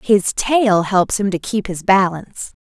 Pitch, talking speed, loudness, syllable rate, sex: 195 Hz, 185 wpm, -16 LUFS, 4.0 syllables/s, female